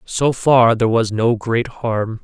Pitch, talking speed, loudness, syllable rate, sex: 115 Hz, 190 wpm, -16 LUFS, 3.8 syllables/s, male